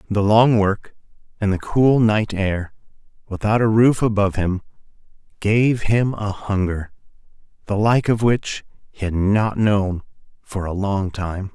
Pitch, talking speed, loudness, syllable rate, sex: 105 Hz, 150 wpm, -19 LUFS, 4.0 syllables/s, male